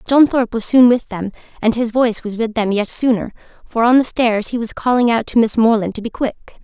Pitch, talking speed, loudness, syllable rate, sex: 230 Hz, 255 wpm, -16 LUFS, 5.7 syllables/s, female